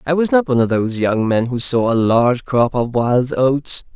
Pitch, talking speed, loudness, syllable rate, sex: 125 Hz, 245 wpm, -16 LUFS, 5.1 syllables/s, male